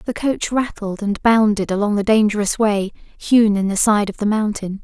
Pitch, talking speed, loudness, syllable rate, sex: 210 Hz, 200 wpm, -18 LUFS, 4.7 syllables/s, female